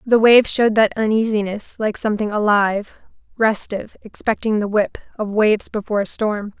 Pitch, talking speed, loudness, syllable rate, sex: 210 Hz, 155 wpm, -18 LUFS, 5.7 syllables/s, female